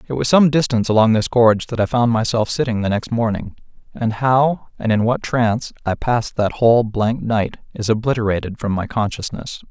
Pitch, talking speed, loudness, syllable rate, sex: 115 Hz, 200 wpm, -18 LUFS, 5.5 syllables/s, male